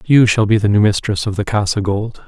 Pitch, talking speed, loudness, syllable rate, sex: 105 Hz, 265 wpm, -15 LUFS, 5.6 syllables/s, male